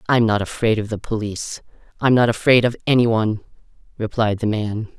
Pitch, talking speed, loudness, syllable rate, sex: 110 Hz, 155 wpm, -19 LUFS, 5.7 syllables/s, female